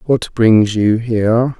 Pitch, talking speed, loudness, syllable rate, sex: 115 Hz, 150 wpm, -14 LUFS, 3.5 syllables/s, male